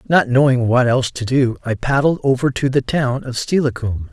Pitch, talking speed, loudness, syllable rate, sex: 130 Hz, 205 wpm, -17 LUFS, 5.2 syllables/s, male